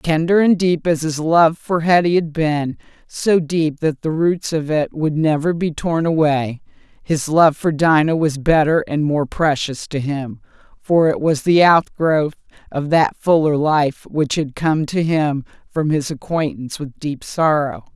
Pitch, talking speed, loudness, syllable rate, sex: 155 Hz, 170 wpm, -17 LUFS, 4.1 syllables/s, female